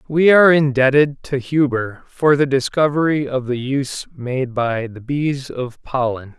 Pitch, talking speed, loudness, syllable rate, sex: 135 Hz, 160 wpm, -18 LUFS, 4.2 syllables/s, male